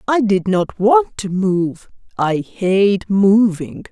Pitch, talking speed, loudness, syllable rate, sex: 200 Hz, 125 wpm, -16 LUFS, 3.0 syllables/s, female